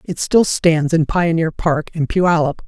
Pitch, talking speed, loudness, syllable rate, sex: 165 Hz, 180 wpm, -16 LUFS, 3.9 syllables/s, female